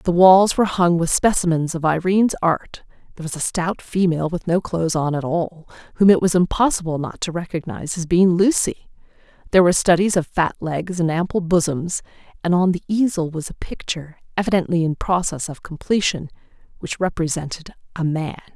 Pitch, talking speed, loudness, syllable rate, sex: 170 Hz, 180 wpm, -19 LUFS, 5.6 syllables/s, female